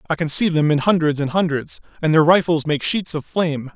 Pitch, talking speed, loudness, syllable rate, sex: 160 Hz, 240 wpm, -18 LUFS, 5.7 syllables/s, male